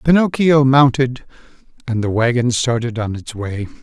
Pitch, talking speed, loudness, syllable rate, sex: 125 Hz, 140 wpm, -16 LUFS, 4.7 syllables/s, male